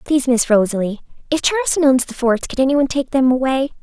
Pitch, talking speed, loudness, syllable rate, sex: 255 Hz, 205 wpm, -17 LUFS, 6.4 syllables/s, female